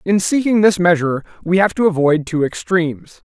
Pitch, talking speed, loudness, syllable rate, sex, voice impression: 175 Hz, 180 wpm, -16 LUFS, 5.5 syllables/s, male, very masculine, very middle-aged, thick, very tensed, very powerful, bright, hard, very clear, fluent, slightly raspy, cool, slightly intellectual, refreshing, sincere, slightly calm, slightly mature, slightly friendly, slightly reassuring, very unique, slightly elegant, wild, slightly sweet, very lively, slightly strict, intense, sharp